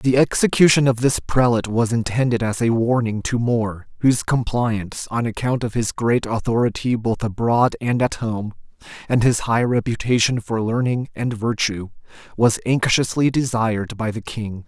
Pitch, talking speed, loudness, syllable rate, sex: 115 Hz, 160 wpm, -20 LUFS, 4.8 syllables/s, male